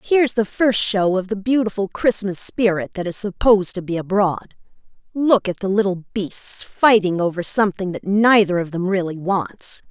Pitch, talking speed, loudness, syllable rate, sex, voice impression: 200 Hz, 175 wpm, -19 LUFS, 4.9 syllables/s, female, feminine, middle-aged, tensed, powerful, slightly hard, clear, intellectual, unique, elegant, lively, intense, sharp